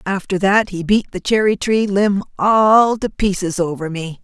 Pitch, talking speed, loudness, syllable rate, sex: 195 Hz, 185 wpm, -16 LUFS, 4.4 syllables/s, female